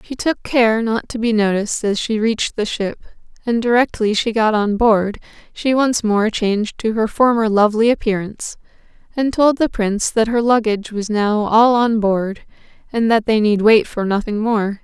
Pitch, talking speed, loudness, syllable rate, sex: 220 Hz, 190 wpm, -17 LUFS, 4.8 syllables/s, female